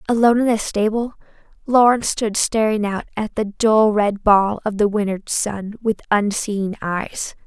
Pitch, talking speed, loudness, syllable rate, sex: 210 Hz, 160 wpm, -19 LUFS, 4.4 syllables/s, female